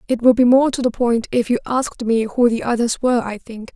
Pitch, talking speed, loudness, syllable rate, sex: 240 Hz, 270 wpm, -17 LUFS, 5.9 syllables/s, female